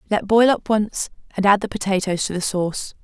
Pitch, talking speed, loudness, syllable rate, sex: 200 Hz, 215 wpm, -20 LUFS, 5.6 syllables/s, female